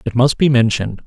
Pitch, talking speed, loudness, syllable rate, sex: 125 Hz, 225 wpm, -15 LUFS, 6.7 syllables/s, male